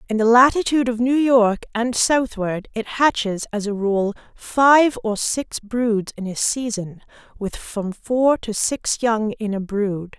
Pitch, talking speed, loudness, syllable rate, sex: 230 Hz, 170 wpm, -20 LUFS, 3.8 syllables/s, female